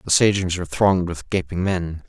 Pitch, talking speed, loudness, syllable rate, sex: 90 Hz, 200 wpm, -21 LUFS, 5.6 syllables/s, male